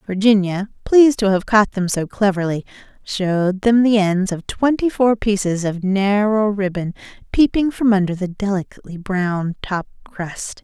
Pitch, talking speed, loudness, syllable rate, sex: 200 Hz, 150 wpm, -18 LUFS, 4.6 syllables/s, female